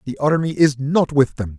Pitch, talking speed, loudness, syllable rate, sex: 140 Hz, 225 wpm, -18 LUFS, 4.8 syllables/s, male